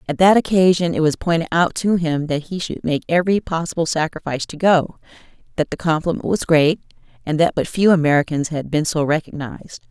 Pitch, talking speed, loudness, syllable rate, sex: 165 Hz, 195 wpm, -18 LUFS, 5.8 syllables/s, female